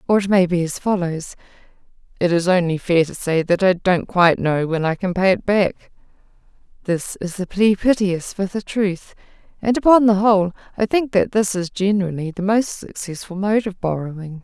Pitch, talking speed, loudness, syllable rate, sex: 190 Hz, 195 wpm, -19 LUFS, 5.1 syllables/s, female